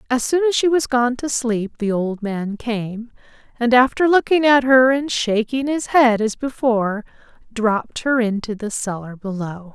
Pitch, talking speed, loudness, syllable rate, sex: 235 Hz, 180 wpm, -19 LUFS, 4.4 syllables/s, female